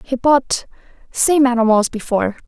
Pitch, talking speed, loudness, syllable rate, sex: 245 Hz, 95 wpm, -16 LUFS, 5.3 syllables/s, female